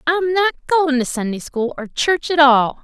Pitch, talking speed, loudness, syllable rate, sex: 295 Hz, 210 wpm, -17 LUFS, 4.7 syllables/s, female